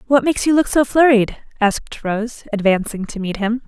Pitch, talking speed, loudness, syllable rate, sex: 230 Hz, 195 wpm, -17 LUFS, 5.3 syllables/s, female